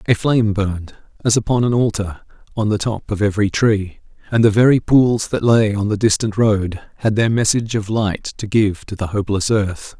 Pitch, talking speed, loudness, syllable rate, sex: 105 Hz, 205 wpm, -17 LUFS, 5.2 syllables/s, male